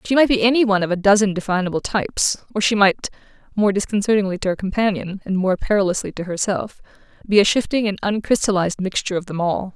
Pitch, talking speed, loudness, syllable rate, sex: 200 Hz, 185 wpm, -19 LUFS, 6.6 syllables/s, female